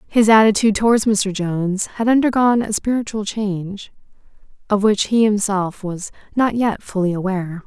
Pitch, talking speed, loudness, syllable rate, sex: 205 Hz, 150 wpm, -18 LUFS, 5.2 syllables/s, female